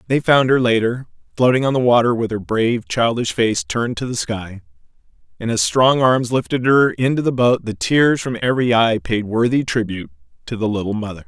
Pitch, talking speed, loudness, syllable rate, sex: 115 Hz, 200 wpm, -17 LUFS, 5.5 syllables/s, male